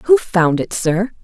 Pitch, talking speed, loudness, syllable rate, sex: 210 Hz, 195 wpm, -16 LUFS, 3.6 syllables/s, female